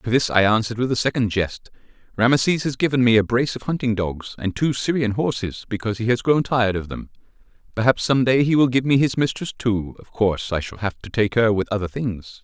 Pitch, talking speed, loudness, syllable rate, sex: 115 Hz, 235 wpm, -21 LUFS, 6.0 syllables/s, male